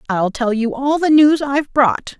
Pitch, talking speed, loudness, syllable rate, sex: 265 Hz, 220 wpm, -15 LUFS, 4.6 syllables/s, female